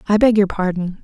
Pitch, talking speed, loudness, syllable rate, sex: 200 Hz, 230 wpm, -17 LUFS, 5.9 syllables/s, female